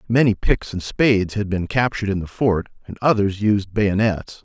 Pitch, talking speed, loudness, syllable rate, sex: 105 Hz, 190 wpm, -20 LUFS, 4.9 syllables/s, male